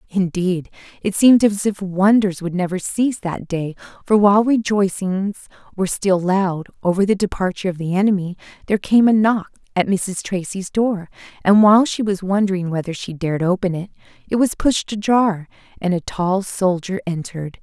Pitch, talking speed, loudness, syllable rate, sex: 190 Hz, 170 wpm, -19 LUFS, 5.3 syllables/s, female